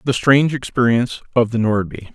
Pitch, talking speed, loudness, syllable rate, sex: 120 Hz, 170 wpm, -17 LUFS, 6.2 syllables/s, male